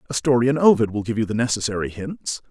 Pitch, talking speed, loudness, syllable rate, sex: 115 Hz, 240 wpm, -21 LUFS, 6.7 syllables/s, male